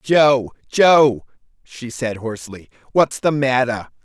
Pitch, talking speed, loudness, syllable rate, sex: 125 Hz, 135 wpm, -17 LUFS, 3.6 syllables/s, male